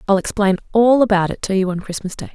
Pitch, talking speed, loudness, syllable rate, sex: 200 Hz, 255 wpm, -17 LUFS, 6.3 syllables/s, female